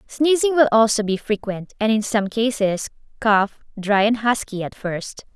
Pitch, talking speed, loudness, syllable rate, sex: 220 Hz, 170 wpm, -20 LUFS, 4.4 syllables/s, female